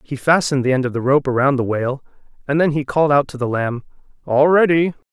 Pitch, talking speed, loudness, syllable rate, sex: 140 Hz, 235 wpm, -17 LUFS, 6.4 syllables/s, male